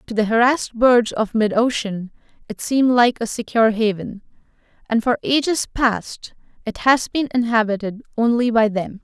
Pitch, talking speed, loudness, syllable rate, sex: 230 Hz, 160 wpm, -19 LUFS, 5.0 syllables/s, female